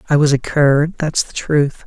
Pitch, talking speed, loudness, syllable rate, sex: 145 Hz, 225 wpm, -16 LUFS, 4.5 syllables/s, male